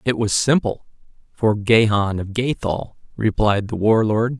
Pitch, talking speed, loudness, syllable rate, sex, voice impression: 110 Hz, 125 wpm, -19 LUFS, 4.1 syllables/s, male, very masculine, adult-like, slightly middle-aged, thick, tensed, powerful, very bright, slightly hard, very clear, fluent, cool, intellectual, very refreshing